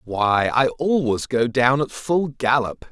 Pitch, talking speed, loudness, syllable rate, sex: 130 Hz, 165 wpm, -20 LUFS, 3.6 syllables/s, male